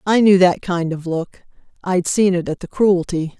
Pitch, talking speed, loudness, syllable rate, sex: 180 Hz, 195 wpm, -17 LUFS, 4.5 syllables/s, female